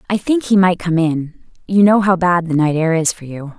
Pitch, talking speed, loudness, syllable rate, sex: 175 Hz, 270 wpm, -15 LUFS, 5.1 syllables/s, female